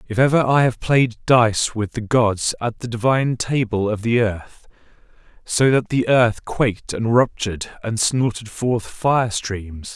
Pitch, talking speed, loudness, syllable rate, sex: 115 Hz, 170 wpm, -19 LUFS, 4.1 syllables/s, male